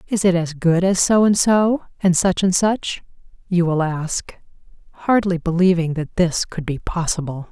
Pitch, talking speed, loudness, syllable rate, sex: 175 Hz, 175 wpm, -19 LUFS, 4.4 syllables/s, female